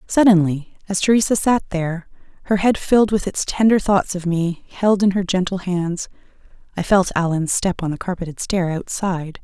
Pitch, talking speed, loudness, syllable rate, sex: 185 Hz, 180 wpm, -19 LUFS, 5.2 syllables/s, female